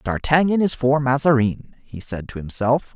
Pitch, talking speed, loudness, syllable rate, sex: 130 Hz, 160 wpm, -20 LUFS, 4.7 syllables/s, male